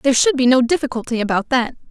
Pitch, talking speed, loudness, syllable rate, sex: 255 Hz, 220 wpm, -17 LUFS, 7.1 syllables/s, female